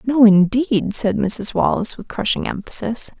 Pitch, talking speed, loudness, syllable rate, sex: 220 Hz, 150 wpm, -17 LUFS, 4.6 syllables/s, female